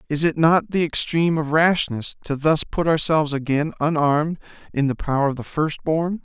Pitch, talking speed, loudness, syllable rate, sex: 155 Hz, 190 wpm, -20 LUFS, 5.4 syllables/s, male